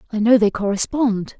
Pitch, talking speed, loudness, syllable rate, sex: 220 Hz, 170 wpm, -18 LUFS, 5.3 syllables/s, female